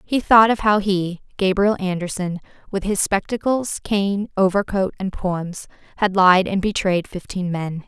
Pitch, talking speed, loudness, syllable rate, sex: 195 Hz, 150 wpm, -20 LUFS, 4.3 syllables/s, female